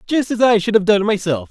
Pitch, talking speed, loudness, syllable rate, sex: 210 Hz, 280 wpm, -16 LUFS, 5.8 syllables/s, male